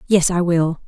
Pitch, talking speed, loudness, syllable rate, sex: 175 Hz, 205 wpm, -17 LUFS, 4.3 syllables/s, female